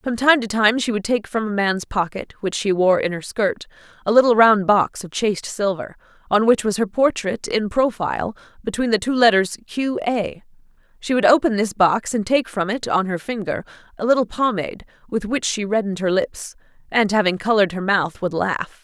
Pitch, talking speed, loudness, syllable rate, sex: 210 Hz, 205 wpm, -20 LUFS, 5.2 syllables/s, female